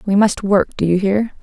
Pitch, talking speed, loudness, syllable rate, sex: 200 Hz, 250 wpm, -16 LUFS, 4.9 syllables/s, female